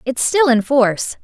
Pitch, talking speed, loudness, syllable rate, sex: 255 Hz, 195 wpm, -15 LUFS, 4.7 syllables/s, female